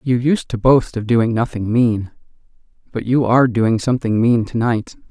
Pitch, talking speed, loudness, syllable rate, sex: 115 Hz, 175 wpm, -17 LUFS, 4.8 syllables/s, male